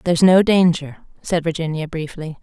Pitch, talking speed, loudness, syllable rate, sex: 165 Hz, 150 wpm, -18 LUFS, 5.2 syllables/s, female